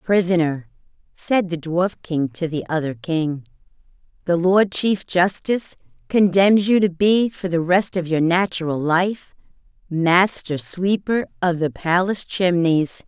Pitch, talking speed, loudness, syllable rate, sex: 175 Hz, 140 wpm, -19 LUFS, 4.1 syllables/s, female